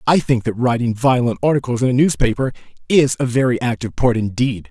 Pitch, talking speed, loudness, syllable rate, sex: 125 Hz, 190 wpm, -17 LUFS, 6.0 syllables/s, male